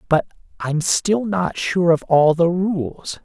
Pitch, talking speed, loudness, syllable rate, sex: 170 Hz, 165 wpm, -19 LUFS, 3.4 syllables/s, male